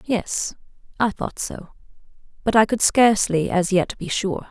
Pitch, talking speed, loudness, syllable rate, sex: 200 Hz, 160 wpm, -21 LUFS, 4.3 syllables/s, female